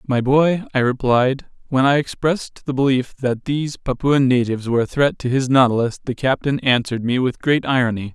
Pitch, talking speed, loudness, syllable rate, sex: 130 Hz, 190 wpm, -19 LUFS, 5.5 syllables/s, male